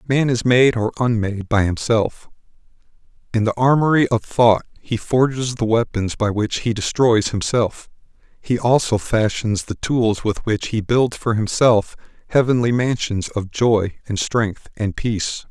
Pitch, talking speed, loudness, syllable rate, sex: 115 Hz, 155 wpm, -19 LUFS, 4.3 syllables/s, male